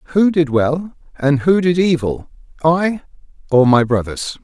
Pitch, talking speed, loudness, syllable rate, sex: 155 Hz, 135 wpm, -16 LUFS, 4.2 syllables/s, male